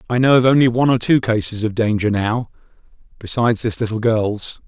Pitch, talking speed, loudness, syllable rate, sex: 115 Hz, 190 wpm, -17 LUFS, 5.8 syllables/s, male